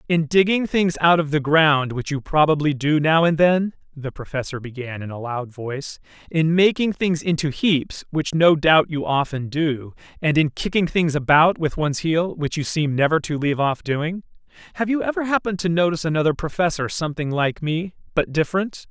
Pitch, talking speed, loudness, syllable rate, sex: 155 Hz, 185 wpm, -20 LUFS, 5.2 syllables/s, male